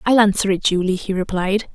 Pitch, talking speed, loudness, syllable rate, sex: 195 Hz, 205 wpm, -19 LUFS, 5.6 syllables/s, female